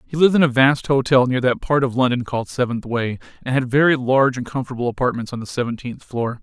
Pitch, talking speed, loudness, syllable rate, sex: 130 Hz, 235 wpm, -19 LUFS, 6.5 syllables/s, male